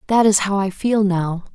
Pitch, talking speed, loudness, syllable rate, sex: 200 Hz, 235 wpm, -18 LUFS, 4.7 syllables/s, female